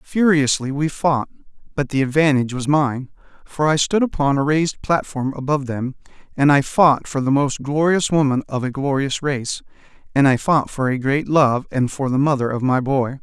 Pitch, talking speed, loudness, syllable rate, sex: 140 Hz, 195 wpm, -19 LUFS, 5.1 syllables/s, male